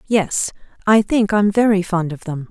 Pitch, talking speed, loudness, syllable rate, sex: 195 Hz, 190 wpm, -18 LUFS, 4.5 syllables/s, female